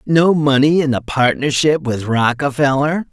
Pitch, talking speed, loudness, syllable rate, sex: 140 Hz, 135 wpm, -15 LUFS, 4.4 syllables/s, male